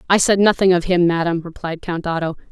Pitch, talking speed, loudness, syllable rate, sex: 175 Hz, 215 wpm, -18 LUFS, 6.0 syllables/s, female